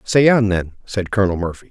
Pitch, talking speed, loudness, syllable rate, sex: 100 Hz, 210 wpm, -18 LUFS, 6.1 syllables/s, male